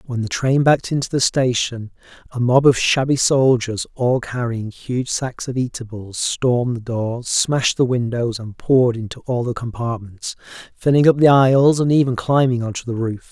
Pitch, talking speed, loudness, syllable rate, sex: 125 Hz, 180 wpm, -18 LUFS, 4.9 syllables/s, male